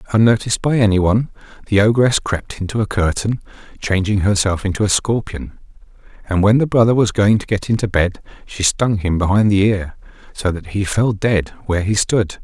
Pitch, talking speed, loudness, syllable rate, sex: 105 Hz, 185 wpm, -17 LUFS, 5.4 syllables/s, male